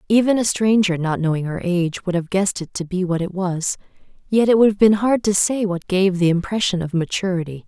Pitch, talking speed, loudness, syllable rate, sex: 190 Hz, 235 wpm, -19 LUFS, 5.8 syllables/s, female